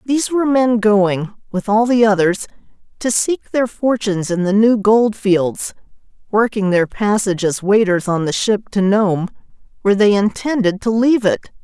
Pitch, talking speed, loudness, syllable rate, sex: 210 Hz, 170 wpm, -16 LUFS, 4.8 syllables/s, female